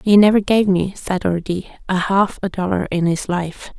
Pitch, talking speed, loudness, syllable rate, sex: 190 Hz, 205 wpm, -18 LUFS, 4.8 syllables/s, female